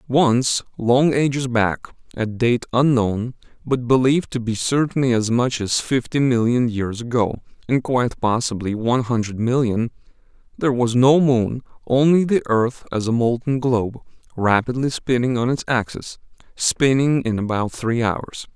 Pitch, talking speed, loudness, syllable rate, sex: 120 Hz, 145 wpm, -20 LUFS, 4.6 syllables/s, male